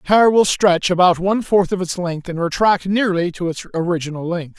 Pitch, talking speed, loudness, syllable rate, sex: 180 Hz, 210 wpm, -17 LUFS, 5.3 syllables/s, male